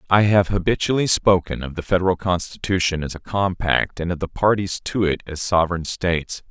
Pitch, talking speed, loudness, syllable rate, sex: 90 Hz, 185 wpm, -21 LUFS, 5.5 syllables/s, male